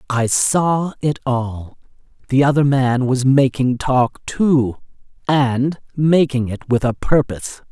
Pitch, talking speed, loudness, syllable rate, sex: 130 Hz, 130 wpm, -17 LUFS, 3.6 syllables/s, male